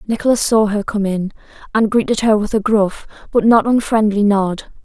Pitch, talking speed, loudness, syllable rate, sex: 210 Hz, 185 wpm, -16 LUFS, 5.1 syllables/s, female